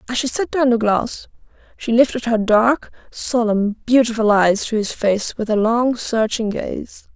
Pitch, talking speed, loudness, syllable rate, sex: 230 Hz, 175 wpm, -18 LUFS, 4.2 syllables/s, female